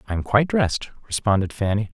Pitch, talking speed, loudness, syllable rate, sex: 110 Hz, 180 wpm, -22 LUFS, 6.7 syllables/s, male